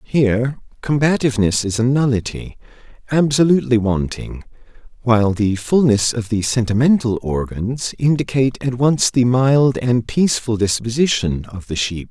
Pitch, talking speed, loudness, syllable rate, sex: 120 Hz, 115 wpm, -17 LUFS, 4.8 syllables/s, male